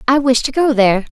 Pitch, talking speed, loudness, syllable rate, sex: 255 Hz, 260 wpm, -14 LUFS, 6.3 syllables/s, female